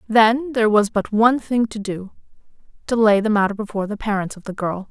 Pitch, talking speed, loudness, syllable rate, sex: 215 Hz, 210 wpm, -19 LUFS, 6.0 syllables/s, female